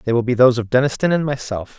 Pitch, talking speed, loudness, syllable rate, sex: 125 Hz, 270 wpm, -17 LUFS, 6.9 syllables/s, male